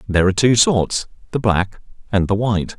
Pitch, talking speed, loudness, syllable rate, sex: 105 Hz, 195 wpm, -18 LUFS, 5.8 syllables/s, male